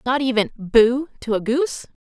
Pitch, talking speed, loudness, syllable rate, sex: 245 Hz, 175 wpm, -20 LUFS, 4.9 syllables/s, female